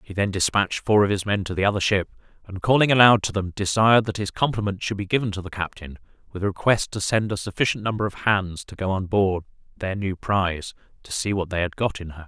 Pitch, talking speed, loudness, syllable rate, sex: 100 Hz, 250 wpm, -22 LUFS, 6.2 syllables/s, male